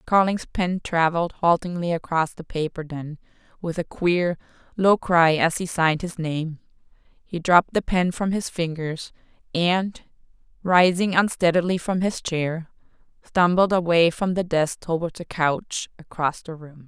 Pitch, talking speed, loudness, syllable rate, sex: 170 Hz, 150 wpm, -22 LUFS, 4.3 syllables/s, female